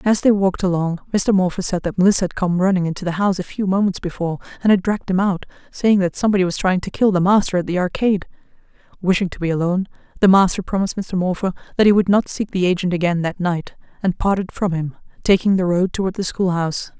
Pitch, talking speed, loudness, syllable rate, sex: 185 Hz, 230 wpm, -19 LUFS, 6.6 syllables/s, female